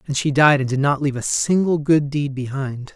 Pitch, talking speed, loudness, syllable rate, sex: 140 Hz, 245 wpm, -19 LUFS, 5.4 syllables/s, male